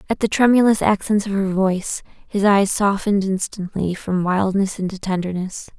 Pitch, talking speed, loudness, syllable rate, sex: 195 Hz, 155 wpm, -19 LUFS, 5.1 syllables/s, female